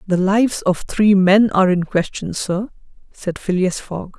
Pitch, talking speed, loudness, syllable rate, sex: 190 Hz, 170 wpm, -17 LUFS, 4.4 syllables/s, female